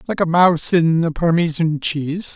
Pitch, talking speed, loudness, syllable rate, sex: 165 Hz, 180 wpm, -17 LUFS, 5.1 syllables/s, male